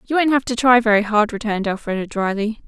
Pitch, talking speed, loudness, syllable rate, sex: 225 Hz, 225 wpm, -18 LUFS, 6.4 syllables/s, female